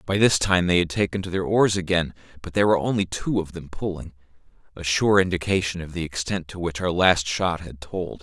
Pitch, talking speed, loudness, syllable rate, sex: 90 Hz, 225 wpm, -23 LUFS, 5.7 syllables/s, male